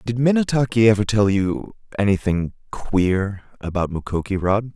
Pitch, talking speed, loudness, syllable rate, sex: 105 Hz, 90 wpm, -20 LUFS, 4.6 syllables/s, male